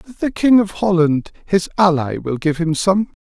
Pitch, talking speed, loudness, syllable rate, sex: 180 Hz, 185 wpm, -17 LUFS, 4.1 syllables/s, male